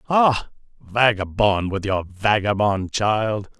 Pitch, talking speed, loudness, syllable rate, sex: 105 Hz, 100 wpm, -20 LUFS, 3.4 syllables/s, male